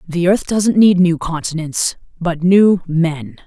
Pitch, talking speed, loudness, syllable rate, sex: 175 Hz, 155 wpm, -15 LUFS, 3.6 syllables/s, female